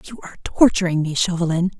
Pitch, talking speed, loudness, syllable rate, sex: 175 Hz, 165 wpm, -18 LUFS, 6.6 syllables/s, female